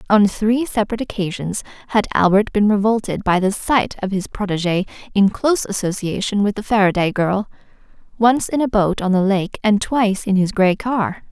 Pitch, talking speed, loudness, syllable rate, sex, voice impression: 205 Hz, 175 wpm, -18 LUFS, 5.2 syllables/s, female, feminine, slightly gender-neutral, slightly young, slightly adult-like, thin, tensed, powerful, bright, soft, very clear, fluent, slightly raspy, slightly cute, cool, very intellectual, very refreshing, sincere, very calm, very friendly, very reassuring, slightly unique, elegant, slightly wild, very sweet, lively, kind, slightly intense, slightly modest, light